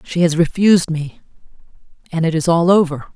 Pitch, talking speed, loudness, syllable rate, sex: 165 Hz, 170 wpm, -16 LUFS, 5.8 syllables/s, female